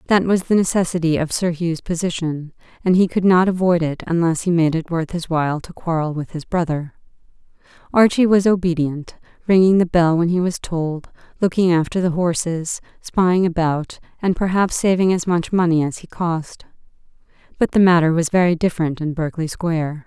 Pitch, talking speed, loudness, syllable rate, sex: 170 Hz, 180 wpm, -19 LUFS, 5.3 syllables/s, female